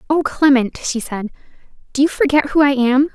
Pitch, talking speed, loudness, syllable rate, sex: 275 Hz, 190 wpm, -16 LUFS, 5.2 syllables/s, female